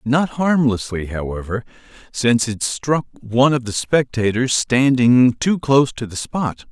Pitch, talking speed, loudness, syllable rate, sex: 125 Hz, 145 wpm, -18 LUFS, 4.3 syllables/s, male